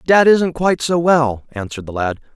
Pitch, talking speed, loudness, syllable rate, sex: 145 Hz, 205 wpm, -16 LUFS, 5.3 syllables/s, male